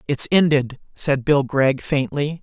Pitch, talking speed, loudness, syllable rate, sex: 140 Hz, 150 wpm, -19 LUFS, 3.8 syllables/s, male